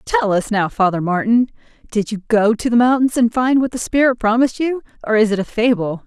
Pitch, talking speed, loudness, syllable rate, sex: 225 Hz, 230 wpm, -17 LUFS, 5.8 syllables/s, female